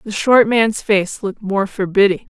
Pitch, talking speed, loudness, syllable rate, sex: 205 Hz, 180 wpm, -16 LUFS, 4.6 syllables/s, female